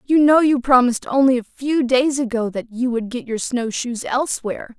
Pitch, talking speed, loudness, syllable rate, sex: 250 Hz, 215 wpm, -19 LUFS, 5.2 syllables/s, female